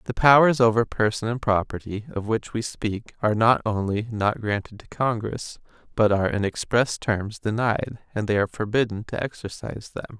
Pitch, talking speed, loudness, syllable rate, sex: 110 Hz, 175 wpm, -24 LUFS, 5.3 syllables/s, male